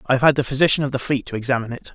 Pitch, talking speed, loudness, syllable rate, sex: 130 Hz, 340 wpm, -20 LUFS, 8.7 syllables/s, male